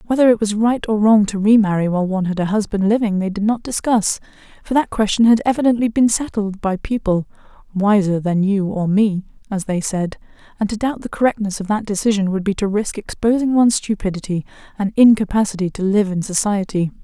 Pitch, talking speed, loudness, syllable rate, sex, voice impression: 205 Hz, 195 wpm, -18 LUFS, 5.8 syllables/s, female, feminine, adult-like, slightly muffled, fluent, slightly sincere, calm, reassuring, slightly unique